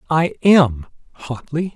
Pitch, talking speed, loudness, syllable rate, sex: 150 Hz, 105 wpm, -16 LUFS, 4.0 syllables/s, male